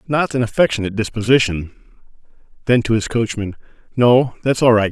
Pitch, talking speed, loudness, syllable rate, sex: 115 Hz, 145 wpm, -17 LUFS, 6.0 syllables/s, male